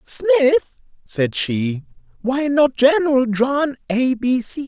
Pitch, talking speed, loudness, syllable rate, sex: 255 Hz, 130 wpm, -18 LUFS, 3.6 syllables/s, male